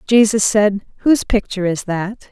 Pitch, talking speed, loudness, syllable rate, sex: 205 Hz, 155 wpm, -16 LUFS, 5.0 syllables/s, female